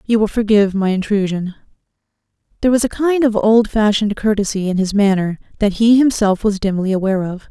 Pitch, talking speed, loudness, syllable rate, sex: 205 Hz, 175 wpm, -16 LUFS, 6.1 syllables/s, female